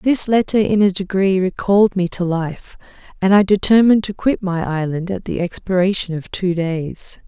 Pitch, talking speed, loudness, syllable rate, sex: 190 Hz, 180 wpm, -17 LUFS, 4.9 syllables/s, female